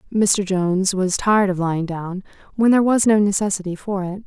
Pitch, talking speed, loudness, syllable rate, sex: 195 Hz, 195 wpm, -19 LUFS, 5.7 syllables/s, female